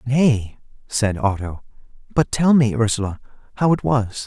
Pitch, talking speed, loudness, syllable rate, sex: 115 Hz, 140 wpm, -19 LUFS, 4.4 syllables/s, male